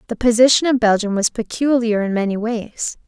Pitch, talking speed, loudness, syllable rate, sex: 225 Hz, 175 wpm, -17 LUFS, 5.3 syllables/s, female